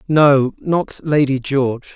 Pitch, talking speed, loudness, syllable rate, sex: 140 Hz, 90 wpm, -16 LUFS, 3.7 syllables/s, male